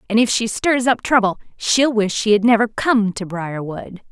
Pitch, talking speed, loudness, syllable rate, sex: 215 Hz, 205 wpm, -18 LUFS, 4.6 syllables/s, female